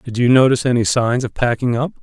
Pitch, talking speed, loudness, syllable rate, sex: 120 Hz, 235 wpm, -16 LUFS, 6.3 syllables/s, male